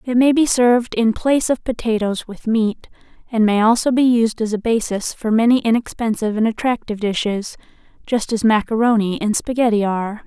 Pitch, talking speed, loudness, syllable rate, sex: 225 Hz, 175 wpm, -18 LUFS, 5.5 syllables/s, female